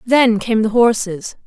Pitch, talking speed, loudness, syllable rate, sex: 225 Hz, 165 wpm, -15 LUFS, 3.9 syllables/s, female